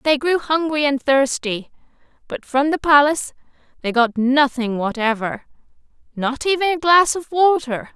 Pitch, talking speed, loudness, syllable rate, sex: 280 Hz, 145 wpm, -18 LUFS, 4.6 syllables/s, female